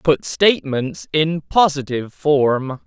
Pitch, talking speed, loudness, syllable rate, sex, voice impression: 135 Hz, 105 wpm, -18 LUFS, 3.6 syllables/s, male, masculine, adult-like, slightly thin, tensed, powerful, hard, clear, cool, intellectual, calm, wild, lively, slightly sharp